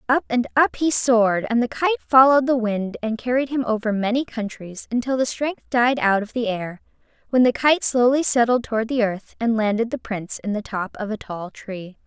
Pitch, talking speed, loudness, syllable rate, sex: 235 Hz, 220 wpm, -21 LUFS, 5.3 syllables/s, female